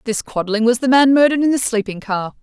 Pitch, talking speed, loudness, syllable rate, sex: 235 Hz, 250 wpm, -16 LUFS, 6.2 syllables/s, female